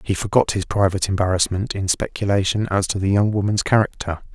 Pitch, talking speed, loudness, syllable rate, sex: 100 Hz, 180 wpm, -20 LUFS, 6.1 syllables/s, male